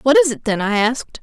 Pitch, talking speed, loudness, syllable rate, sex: 250 Hz, 295 wpm, -17 LUFS, 6.2 syllables/s, female